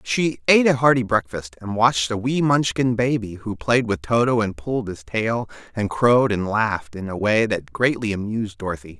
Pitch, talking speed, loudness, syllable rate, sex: 115 Hz, 200 wpm, -21 LUFS, 5.3 syllables/s, male